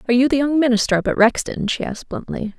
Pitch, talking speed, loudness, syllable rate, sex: 245 Hz, 255 wpm, -19 LUFS, 7.1 syllables/s, female